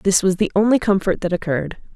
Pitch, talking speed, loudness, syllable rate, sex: 195 Hz, 215 wpm, -18 LUFS, 6.2 syllables/s, female